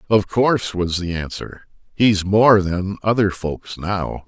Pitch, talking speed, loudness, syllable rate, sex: 95 Hz, 155 wpm, -19 LUFS, 3.8 syllables/s, male